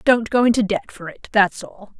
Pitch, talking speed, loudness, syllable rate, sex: 205 Hz, 240 wpm, -18 LUFS, 5.0 syllables/s, female